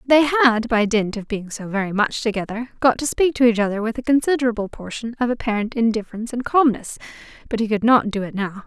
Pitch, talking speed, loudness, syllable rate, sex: 230 Hz, 220 wpm, -20 LUFS, 6.1 syllables/s, female